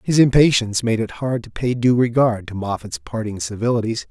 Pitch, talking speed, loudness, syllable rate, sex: 115 Hz, 190 wpm, -19 LUFS, 5.5 syllables/s, male